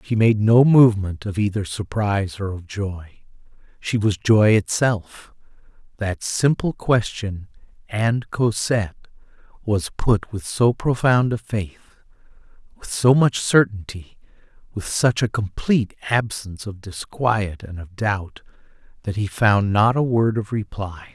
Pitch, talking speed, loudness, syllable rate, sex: 105 Hz, 135 wpm, -20 LUFS, 4.1 syllables/s, male